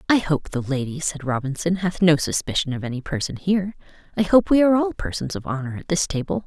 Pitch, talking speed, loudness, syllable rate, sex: 165 Hz, 225 wpm, -22 LUFS, 6.1 syllables/s, female